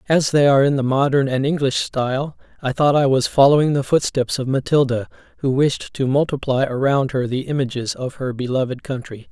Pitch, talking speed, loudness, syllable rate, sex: 135 Hz, 195 wpm, -19 LUFS, 5.5 syllables/s, male